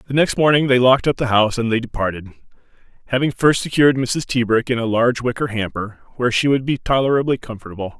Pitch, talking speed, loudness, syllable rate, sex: 120 Hz, 205 wpm, -18 LUFS, 6.8 syllables/s, male